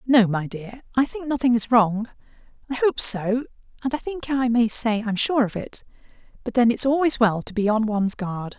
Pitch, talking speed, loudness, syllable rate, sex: 235 Hz, 215 wpm, -22 LUFS, 5.1 syllables/s, female